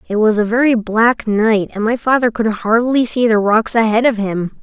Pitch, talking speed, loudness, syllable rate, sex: 225 Hz, 220 wpm, -14 LUFS, 4.8 syllables/s, female